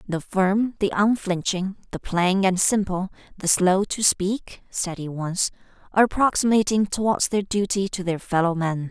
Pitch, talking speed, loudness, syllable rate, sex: 190 Hz, 160 wpm, -22 LUFS, 4.5 syllables/s, female